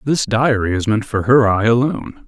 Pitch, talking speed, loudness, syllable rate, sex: 115 Hz, 210 wpm, -16 LUFS, 5.2 syllables/s, male